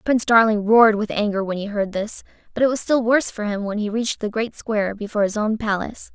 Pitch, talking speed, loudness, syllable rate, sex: 215 Hz, 255 wpm, -20 LUFS, 6.4 syllables/s, female